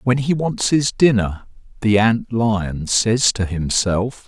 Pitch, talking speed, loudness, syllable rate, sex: 110 Hz, 155 wpm, -18 LUFS, 3.4 syllables/s, male